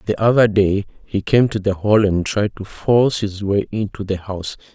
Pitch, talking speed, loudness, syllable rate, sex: 105 Hz, 215 wpm, -18 LUFS, 5.0 syllables/s, male